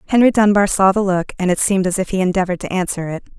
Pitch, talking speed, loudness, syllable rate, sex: 190 Hz, 265 wpm, -17 LUFS, 7.5 syllables/s, female